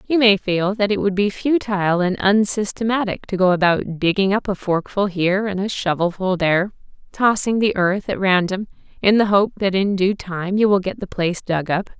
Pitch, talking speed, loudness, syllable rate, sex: 195 Hz, 205 wpm, -19 LUFS, 5.2 syllables/s, female